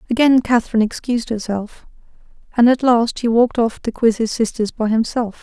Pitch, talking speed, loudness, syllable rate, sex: 230 Hz, 175 wpm, -17 LUFS, 5.7 syllables/s, female